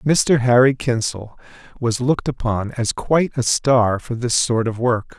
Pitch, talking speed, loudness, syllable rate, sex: 120 Hz, 175 wpm, -18 LUFS, 4.3 syllables/s, male